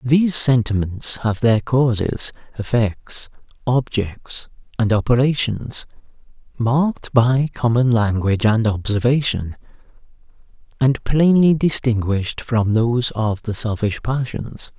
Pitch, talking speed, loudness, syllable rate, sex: 120 Hz, 95 wpm, -19 LUFS, 4.0 syllables/s, male